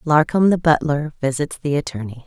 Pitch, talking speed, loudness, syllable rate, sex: 145 Hz, 160 wpm, -19 LUFS, 5.3 syllables/s, female